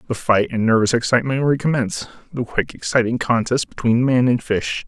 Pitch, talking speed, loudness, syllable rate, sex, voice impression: 120 Hz, 160 wpm, -19 LUFS, 5.7 syllables/s, male, very masculine, very adult-like, calm, mature, reassuring, slightly wild, slightly sweet